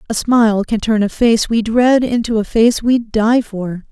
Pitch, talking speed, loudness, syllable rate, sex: 225 Hz, 215 wpm, -14 LUFS, 4.4 syllables/s, female